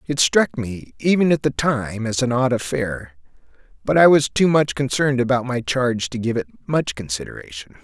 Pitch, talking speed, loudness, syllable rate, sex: 125 Hz, 190 wpm, -19 LUFS, 5.2 syllables/s, male